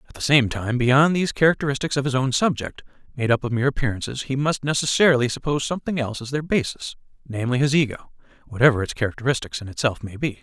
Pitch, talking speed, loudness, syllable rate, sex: 130 Hz, 200 wpm, -22 LUFS, 7.0 syllables/s, male